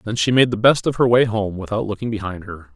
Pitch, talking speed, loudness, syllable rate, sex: 110 Hz, 285 wpm, -18 LUFS, 6.1 syllables/s, male